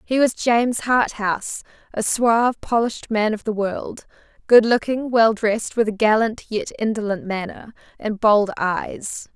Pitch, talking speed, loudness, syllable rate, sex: 220 Hz, 155 wpm, -20 LUFS, 4.6 syllables/s, female